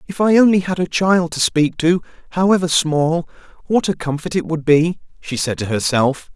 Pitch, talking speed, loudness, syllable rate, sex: 165 Hz, 200 wpm, -17 LUFS, 4.9 syllables/s, male